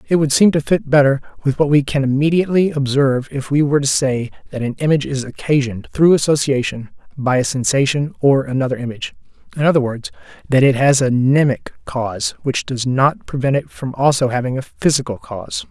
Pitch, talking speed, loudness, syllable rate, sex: 135 Hz, 185 wpm, -17 LUFS, 6.0 syllables/s, male